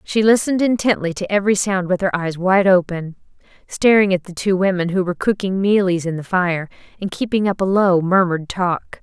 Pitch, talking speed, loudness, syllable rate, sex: 190 Hz, 200 wpm, -18 LUFS, 5.6 syllables/s, female